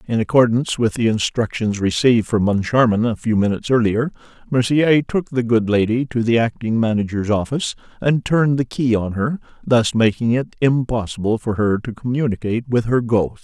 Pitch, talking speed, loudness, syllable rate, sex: 115 Hz, 175 wpm, -18 LUFS, 5.5 syllables/s, male